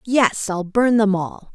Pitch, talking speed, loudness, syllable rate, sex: 210 Hz, 195 wpm, -19 LUFS, 3.5 syllables/s, female